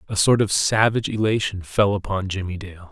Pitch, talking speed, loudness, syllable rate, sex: 100 Hz, 185 wpm, -21 LUFS, 5.5 syllables/s, male